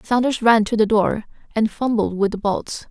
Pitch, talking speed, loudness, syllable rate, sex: 220 Hz, 205 wpm, -19 LUFS, 4.7 syllables/s, female